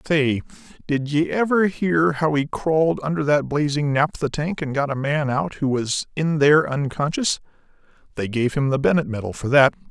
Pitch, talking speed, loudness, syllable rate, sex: 145 Hz, 190 wpm, -21 LUFS, 4.9 syllables/s, male